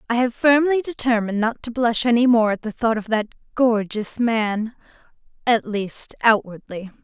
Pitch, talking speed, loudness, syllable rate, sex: 230 Hz, 155 wpm, -20 LUFS, 4.7 syllables/s, female